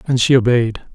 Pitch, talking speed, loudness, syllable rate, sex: 120 Hz, 190 wpm, -15 LUFS, 5.6 syllables/s, male